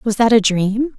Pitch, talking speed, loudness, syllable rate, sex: 220 Hz, 245 wpm, -15 LUFS, 4.4 syllables/s, female